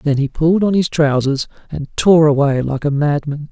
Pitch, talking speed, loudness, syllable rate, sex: 150 Hz, 205 wpm, -15 LUFS, 4.9 syllables/s, male